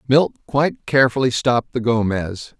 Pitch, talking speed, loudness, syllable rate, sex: 120 Hz, 140 wpm, -19 LUFS, 5.0 syllables/s, male